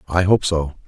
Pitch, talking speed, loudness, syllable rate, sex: 85 Hz, 205 wpm, -18 LUFS, 4.8 syllables/s, male